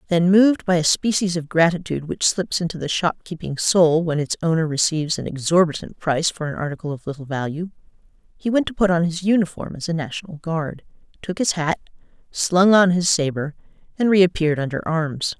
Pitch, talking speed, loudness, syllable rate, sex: 170 Hz, 185 wpm, -20 LUFS, 5.7 syllables/s, female